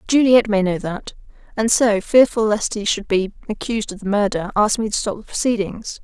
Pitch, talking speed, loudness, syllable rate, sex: 210 Hz, 200 wpm, -19 LUFS, 5.3 syllables/s, female